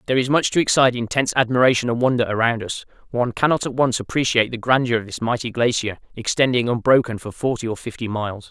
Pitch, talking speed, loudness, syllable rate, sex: 120 Hz, 205 wpm, -20 LUFS, 6.8 syllables/s, male